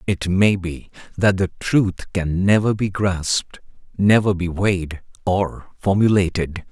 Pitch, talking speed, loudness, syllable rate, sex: 95 Hz, 135 wpm, -20 LUFS, 3.9 syllables/s, male